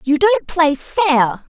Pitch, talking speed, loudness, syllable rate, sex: 285 Hz, 155 wpm, -16 LUFS, 2.9 syllables/s, female